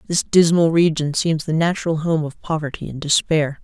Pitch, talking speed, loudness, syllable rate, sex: 160 Hz, 180 wpm, -19 LUFS, 5.2 syllables/s, female